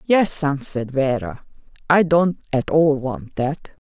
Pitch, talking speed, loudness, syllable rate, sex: 150 Hz, 140 wpm, -20 LUFS, 3.9 syllables/s, female